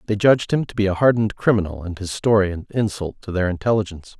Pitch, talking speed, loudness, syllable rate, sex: 100 Hz, 230 wpm, -20 LUFS, 6.9 syllables/s, male